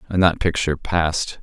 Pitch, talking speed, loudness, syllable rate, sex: 85 Hz, 170 wpm, -20 LUFS, 5.6 syllables/s, male